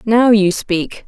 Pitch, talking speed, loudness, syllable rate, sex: 210 Hz, 165 wpm, -14 LUFS, 3.1 syllables/s, female